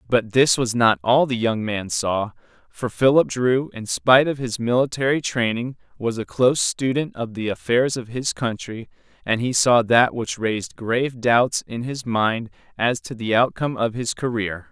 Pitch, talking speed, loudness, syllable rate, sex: 120 Hz, 190 wpm, -21 LUFS, 4.6 syllables/s, male